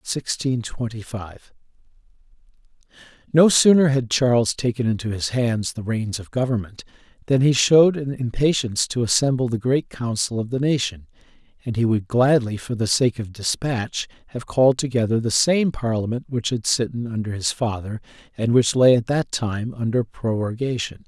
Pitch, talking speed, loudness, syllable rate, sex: 120 Hz, 160 wpm, -21 LUFS, 4.9 syllables/s, male